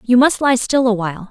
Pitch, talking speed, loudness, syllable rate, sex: 235 Hz, 230 wpm, -15 LUFS, 5.8 syllables/s, female